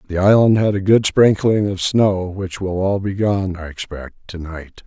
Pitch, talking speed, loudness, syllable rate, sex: 95 Hz, 210 wpm, -17 LUFS, 4.6 syllables/s, male